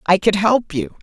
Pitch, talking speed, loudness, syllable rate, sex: 205 Hz, 235 wpm, -17 LUFS, 4.6 syllables/s, female